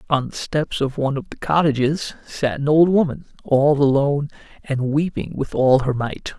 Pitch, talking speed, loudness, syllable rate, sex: 140 Hz, 190 wpm, -20 LUFS, 4.9 syllables/s, male